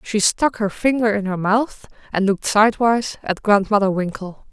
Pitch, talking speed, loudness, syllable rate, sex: 210 Hz, 175 wpm, -19 LUFS, 5.1 syllables/s, female